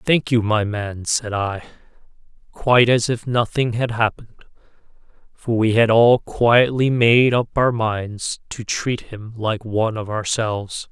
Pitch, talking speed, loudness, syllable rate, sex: 115 Hz, 155 wpm, -19 LUFS, 4.1 syllables/s, male